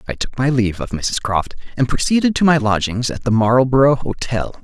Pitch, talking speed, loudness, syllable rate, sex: 125 Hz, 205 wpm, -17 LUFS, 5.4 syllables/s, male